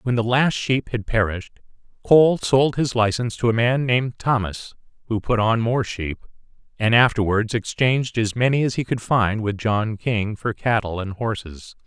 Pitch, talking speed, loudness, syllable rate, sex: 115 Hz, 180 wpm, -21 LUFS, 4.8 syllables/s, male